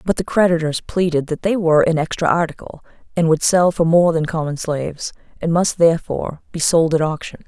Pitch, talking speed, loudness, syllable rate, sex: 165 Hz, 200 wpm, -18 LUFS, 5.7 syllables/s, female